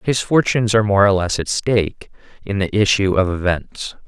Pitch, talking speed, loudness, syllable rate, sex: 100 Hz, 190 wpm, -17 LUFS, 5.3 syllables/s, male